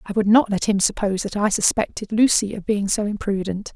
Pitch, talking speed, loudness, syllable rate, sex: 205 Hz, 225 wpm, -20 LUFS, 5.8 syllables/s, female